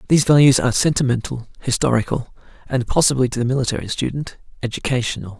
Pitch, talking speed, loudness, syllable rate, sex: 125 Hz, 135 wpm, -19 LUFS, 6.8 syllables/s, male